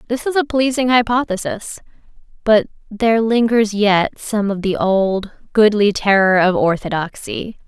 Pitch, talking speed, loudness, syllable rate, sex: 215 Hz, 135 wpm, -16 LUFS, 4.4 syllables/s, female